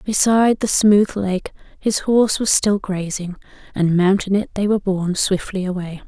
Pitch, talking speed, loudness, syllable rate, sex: 195 Hz, 170 wpm, -18 LUFS, 5.0 syllables/s, female